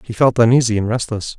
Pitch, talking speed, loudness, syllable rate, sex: 115 Hz, 215 wpm, -16 LUFS, 6.2 syllables/s, male